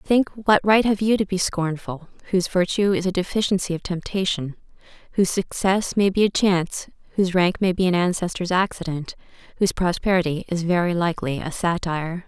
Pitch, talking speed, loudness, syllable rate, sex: 180 Hz, 170 wpm, -22 LUFS, 5.6 syllables/s, female